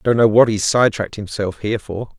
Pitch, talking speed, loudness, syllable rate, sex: 105 Hz, 245 wpm, -17 LUFS, 5.9 syllables/s, male